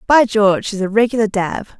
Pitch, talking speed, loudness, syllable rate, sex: 215 Hz, 200 wpm, -16 LUFS, 5.8 syllables/s, female